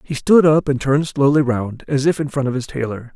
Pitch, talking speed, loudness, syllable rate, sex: 140 Hz, 265 wpm, -17 LUFS, 5.7 syllables/s, male